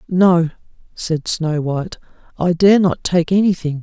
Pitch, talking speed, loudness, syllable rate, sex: 170 Hz, 140 wpm, -16 LUFS, 4.2 syllables/s, male